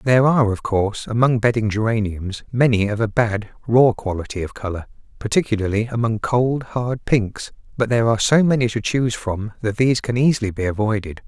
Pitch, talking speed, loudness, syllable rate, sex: 115 Hz, 180 wpm, -20 LUFS, 5.8 syllables/s, male